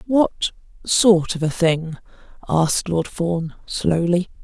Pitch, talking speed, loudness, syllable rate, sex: 175 Hz, 120 wpm, -20 LUFS, 3.4 syllables/s, female